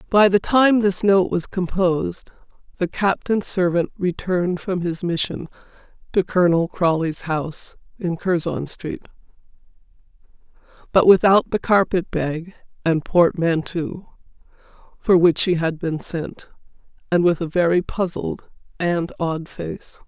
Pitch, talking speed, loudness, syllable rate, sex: 175 Hz, 125 wpm, -20 LUFS, 4.1 syllables/s, female